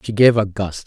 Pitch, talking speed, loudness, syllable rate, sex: 100 Hz, 275 wpm, -17 LUFS, 5.2 syllables/s, male